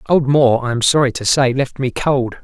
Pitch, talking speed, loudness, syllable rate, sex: 130 Hz, 245 wpm, -15 LUFS, 5.3 syllables/s, male